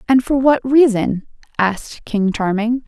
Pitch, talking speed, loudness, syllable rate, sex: 235 Hz, 145 wpm, -16 LUFS, 4.2 syllables/s, female